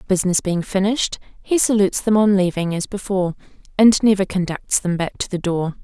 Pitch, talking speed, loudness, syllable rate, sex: 195 Hz, 195 wpm, -19 LUFS, 5.9 syllables/s, female